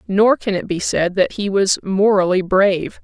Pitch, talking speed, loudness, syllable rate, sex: 195 Hz, 200 wpm, -17 LUFS, 4.6 syllables/s, female